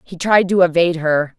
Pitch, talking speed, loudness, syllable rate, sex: 170 Hz, 215 wpm, -15 LUFS, 5.4 syllables/s, female